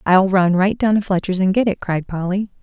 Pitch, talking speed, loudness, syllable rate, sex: 190 Hz, 250 wpm, -18 LUFS, 5.4 syllables/s, female